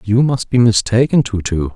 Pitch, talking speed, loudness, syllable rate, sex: 110 Hz, 205 wpm, -15 LUFS, 4.9 syllables/s, male